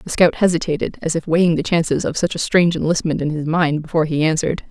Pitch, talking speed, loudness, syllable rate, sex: 165 Hz, 240 wpm, -18 LUFS, 6.7 syllables/s, female